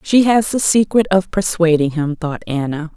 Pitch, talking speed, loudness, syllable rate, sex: 180 Hz, 180 wpm, -16 LUFS, 4.6 syllables/s, female